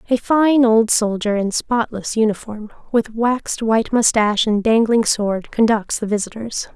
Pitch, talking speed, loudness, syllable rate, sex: 225 Hz, 150 wpm, -17 LUFS, 4.6 syllables/s, female